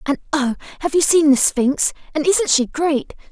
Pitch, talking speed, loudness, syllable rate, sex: 295 Hz, 200 wpm, -17 LUFS, 4.6 syllables/s, female